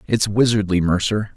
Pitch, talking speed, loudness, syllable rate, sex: 105 Hz, 130 wpm, -18 LUFS, 5.0 syllables/s, male